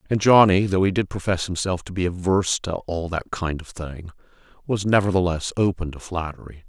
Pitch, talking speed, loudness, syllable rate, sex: 90 Hz, 190 wpm, -22 LUFS, 5.4 syllables/s, male